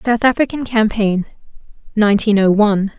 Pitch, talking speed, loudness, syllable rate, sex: 215 Hz, 120 wpm, -15 LUFS, 5.6 syllables/s, female